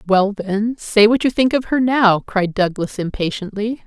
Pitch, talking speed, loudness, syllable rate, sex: 215 Hz, 185 wpm, -17 LUFS, 4.4 syllables/s, female